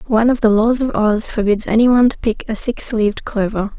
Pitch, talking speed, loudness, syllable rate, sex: 220 Hz, 220 wpm, -16 LUFS, 5.7 syllables/s, female